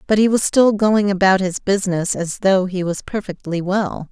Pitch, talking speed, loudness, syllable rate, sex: 195 Hz, 205 wpm, -18 LUFS, 4.8 syllables/s, female